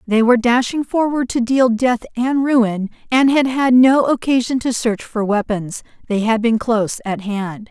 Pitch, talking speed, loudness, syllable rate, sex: 235 Hz, 180 wpm, -17 LUFS, 4.5 syllables/s, female